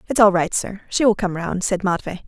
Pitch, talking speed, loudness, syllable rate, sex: 190 Hz, 265 wpm, -20 LUFS, 5.5 syllables/s, female